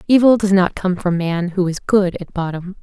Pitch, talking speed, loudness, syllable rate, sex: 185 Hz, 235 wpm, -17 LUFS, 4.9 syllables/s, female